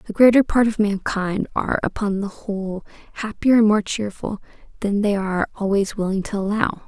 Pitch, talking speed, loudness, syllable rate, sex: 205 Hz, 175 wpm, -21 LUFS, 5.3 syllables/s, female